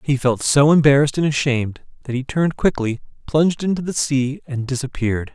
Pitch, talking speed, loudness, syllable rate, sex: 140 Hz, 180 wpm, -19 LUFS, 5.9 syllables/s, male